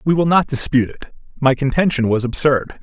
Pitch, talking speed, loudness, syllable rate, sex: 135 Hz, 190 wpm, -17 LUFS, 5.7 syllables/s, male